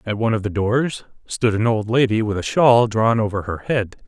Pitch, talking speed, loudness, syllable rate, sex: 110 Hz, 235 wpm, -19 LUFS, 5.2 syllables/s, male